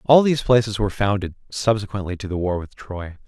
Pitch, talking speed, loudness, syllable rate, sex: 105 Hz, 200 wpm, -21 LUFS, 6.1 syllables/s, male